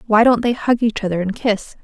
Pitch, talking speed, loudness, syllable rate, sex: 220 Hz, 260 wpm, -17 LUFS, 5.5 syllables/s, female